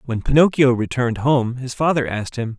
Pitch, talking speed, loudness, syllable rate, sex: 125 Hz, 185 wpm, -19 LUFS, 5.7 syllables/s, male